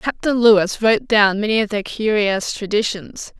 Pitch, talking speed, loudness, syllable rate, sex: 210 Hz, 160 wpm, -17 LUFS, 4.8 syllables/s, female